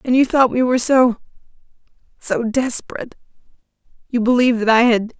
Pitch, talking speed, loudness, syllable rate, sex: 240 Hz, 125 wpm, -16 LUFS, 6.0 syllables/s, female